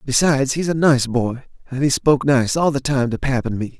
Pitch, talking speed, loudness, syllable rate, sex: 135 Hz, 255 wpm, -18 LUFS, 5.5 syllables/s, male